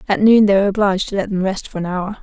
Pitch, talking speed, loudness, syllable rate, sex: 195 Hz, 325 wpm, -16 LUFS, 7.3 syllables/s, female